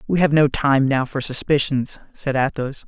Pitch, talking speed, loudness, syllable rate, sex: 140 Hz, 190 wpm, -20 LUFS, 4.6 syllables/s, male